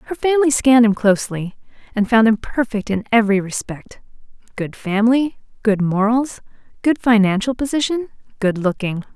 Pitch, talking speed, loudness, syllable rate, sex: 230 Hz, 130 wpm, -18 LUFS, 5.5 syllables/s, female